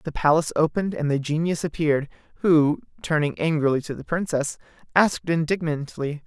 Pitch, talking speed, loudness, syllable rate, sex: 155 Hz, 145 wpm, -23 LUFS, 5.8 syllables/s, male